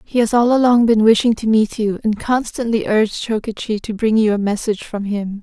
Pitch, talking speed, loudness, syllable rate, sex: 220 Hz, 220 wpm, -17 LUFS, 5.5 syllables/s, female